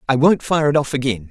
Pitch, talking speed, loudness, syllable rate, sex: 135 Hz, 275 wpm, -17 LUFS, 6.1 syllables/s, male